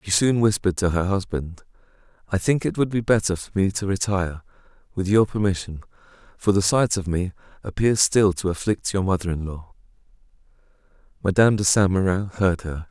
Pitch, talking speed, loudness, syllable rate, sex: 95 Hz, 175 wpm, -22 LUFS, 5.6 syllables/s, male